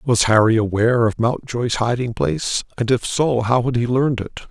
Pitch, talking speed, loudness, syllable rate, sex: 120 Hz, 200 wpm, -19 LUFS, 5.2 syllables/s, male